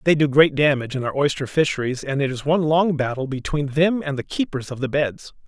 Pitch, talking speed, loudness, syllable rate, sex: 145 Hz, 240 wpm, -21 LUFS, 6.0 syllables/s, male